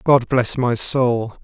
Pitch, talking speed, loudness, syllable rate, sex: 125 Hz, 170 wpm, -18 LUFS, 3.3 syllables/s, male